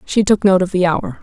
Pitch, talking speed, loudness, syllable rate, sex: 185 Hz, 295 wpm, -15 LUFS, 5.3 syllables/s, female